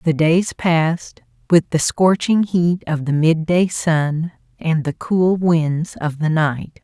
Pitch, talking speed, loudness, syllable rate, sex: 165 Hz, 160 wpm, -18 LUFS, 3.4 syllables/s, female